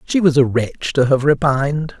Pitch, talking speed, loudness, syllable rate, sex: 140 Hz, 210 wpm, -16 LUFS, 4.8 syllables/s, male